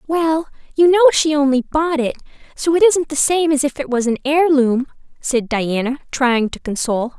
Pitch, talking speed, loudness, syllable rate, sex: 285 Hz, 190 wpm, -17 LUFS, 5.0 syllables/s, female